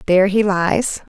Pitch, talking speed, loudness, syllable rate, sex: 195 Hz, 155 wpm, -17 LUFS, 4.5 syllables/s, female